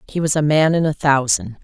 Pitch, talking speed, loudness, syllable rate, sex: 145 Hz, 255 wpm, -17 LUFS, 5.5 syllables/s, female